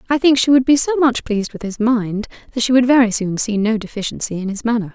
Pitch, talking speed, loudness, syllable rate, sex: 235 Hz, 265 wpm, -17 LUFS, 6.3 syllables/s, female